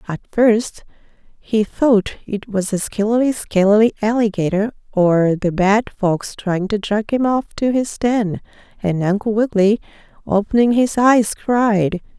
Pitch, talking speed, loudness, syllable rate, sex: 215 Hz, 145 wpm, -17 LUFS, 4.2 syllables/s, female